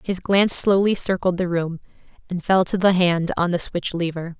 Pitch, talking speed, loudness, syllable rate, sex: 180 Hz, 205 wpm, -20 LUFS, 5.1 syllables/s, female